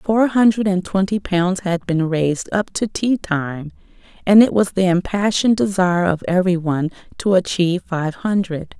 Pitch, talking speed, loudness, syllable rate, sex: 185 Hz, 165 wpm, -18 LUFS, 4.8 syllables/s, female